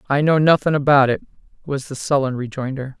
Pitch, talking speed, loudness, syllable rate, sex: 140 Hz, 180 wpm, -18 LUFS, 5.8 syllables/s, female